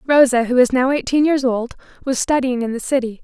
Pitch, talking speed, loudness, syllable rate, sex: 255 Hz, 220 wpm, -17 LUFS, 5.7 syllables/s, female